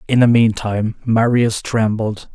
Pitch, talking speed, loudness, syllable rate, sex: 110 Hz, 130 wpm, -16 LUFS, 4.3 syllables/s, male